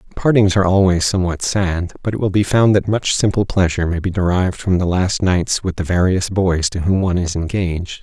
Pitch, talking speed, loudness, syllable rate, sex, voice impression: 95 Hz, 225 wpm, -17 LUFS, 5.8 syllables/s, male, very masculine, very adult-like, very middle-aged, very thick, tensed, slightly weak, bright, dark, hard, slightly muffled, fluent, cool, very intellectual, refreshing, very sincere, calm, mature, friendly, very reassuring, very unique, elegant, wild, sweet, slightly lively, very kind, modest